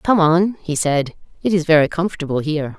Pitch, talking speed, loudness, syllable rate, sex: 160 Hz, 195 wpm, -18 LUFS, 5.7 syllables/s, female